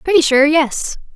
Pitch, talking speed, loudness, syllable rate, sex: 300 Hz, 155 wpm, -14 LUFS, 4.6 syllables/s, female